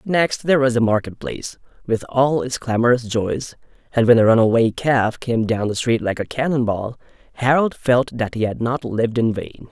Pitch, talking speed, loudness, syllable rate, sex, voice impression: 120 Hz, 205 wpm, -19 LUFS, 5.0 syllables/s, male, masculine, adult-like, tensed, powerful, slightly bright, slightly muffled, fluent, intellectual, friendly, lively, slightly sharp, slightly light